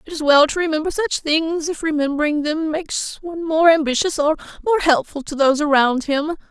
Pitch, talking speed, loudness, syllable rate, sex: 305 Hz, 195 wpm, -18 LUFS, 5.9 syllables/s, female